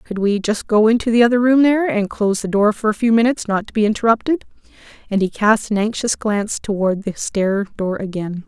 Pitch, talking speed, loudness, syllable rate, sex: 215 Hz, 225 wpm, -17 LUFS, 5.8 syllables/s, female